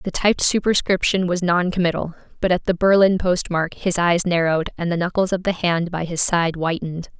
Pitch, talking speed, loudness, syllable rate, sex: 175 Hz, 190 wpm, -20 LUFS, 5.5 syllables/s, female